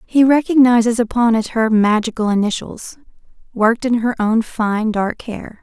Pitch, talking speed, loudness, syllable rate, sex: 230 Hz, 150 wpm, -16 LUFS, 4.7 syllables/s, female